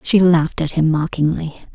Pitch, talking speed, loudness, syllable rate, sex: 160 Hz, 170 wpm, -17 LUFS, 5.0 syllables/s, female